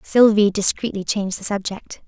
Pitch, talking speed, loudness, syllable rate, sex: 205 Hz, 145 wpm, -19 LUFS, 5.1 syllables/s, female